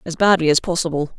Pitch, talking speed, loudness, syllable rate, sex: 165 Hz, 200 wpm, -17 LUFS, 6.4 syllables/s, female